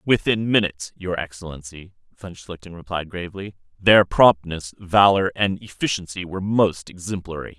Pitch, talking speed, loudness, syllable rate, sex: 90 Hz, 125 wpm, -21 LUFS, 5.0 syllables/s, male